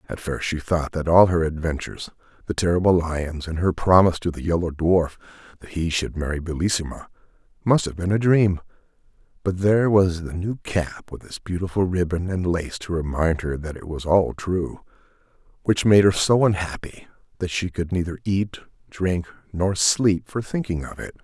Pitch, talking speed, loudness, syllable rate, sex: 90 Hz, 185 wpm, -22 LUFS, 5.0 syllables/s, male